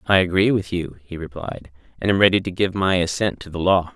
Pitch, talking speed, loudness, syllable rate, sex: 90 Hz, 245 wpm, -20 LUFS, 5.7 syllables/s, male